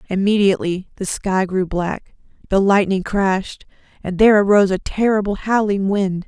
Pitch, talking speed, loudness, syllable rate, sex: 195 Hz, 145 wpm, -18 LUFS, 5.1 syllables/s, female